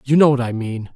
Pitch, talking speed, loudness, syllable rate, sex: 125 Hz, 315 wpm, -18 LUFS, 6.2 syllables/s, male